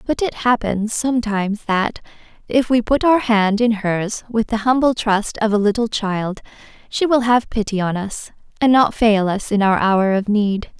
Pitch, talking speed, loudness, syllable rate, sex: 220 Hz, 195 wpm, -18 LUFS, 4.5 syllables/s, female